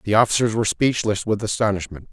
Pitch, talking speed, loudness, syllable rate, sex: 105 Hz, 170 wpm, -20 LUFS, 6.5 syllables/s, male